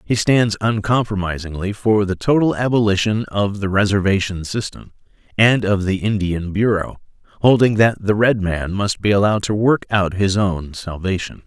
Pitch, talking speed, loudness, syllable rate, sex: 100 Hz, 155 wpm, -18 LUFS, 4.8 syllables/s, male